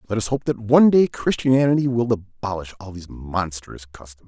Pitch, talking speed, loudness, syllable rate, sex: 110 Hz, 185 wpm, -20 LUFS, 5.7 syllables/s, male